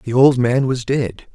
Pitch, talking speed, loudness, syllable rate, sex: 130 Hz, 225 wpm, -17 LUFS, 3.9 syllables/s, male